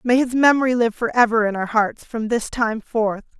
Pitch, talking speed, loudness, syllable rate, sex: 230 Hz, 230 wpm, -19 LUFS, 5.1 syllables/s, female